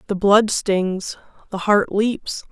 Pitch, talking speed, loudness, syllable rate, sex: 200 Hz, 145 wpm, -19 LUFS, 3.1 syllables/s, female